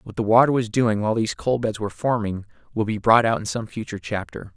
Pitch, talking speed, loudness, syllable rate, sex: 110 Hz, 250 wpm, -22 LUFS, 6.4 syllables/s, male